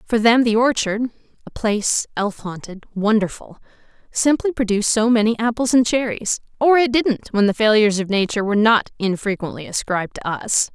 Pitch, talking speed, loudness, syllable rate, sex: 220 Hz, 170 wpm, -19 LUFS, 4.9 syllables/s, female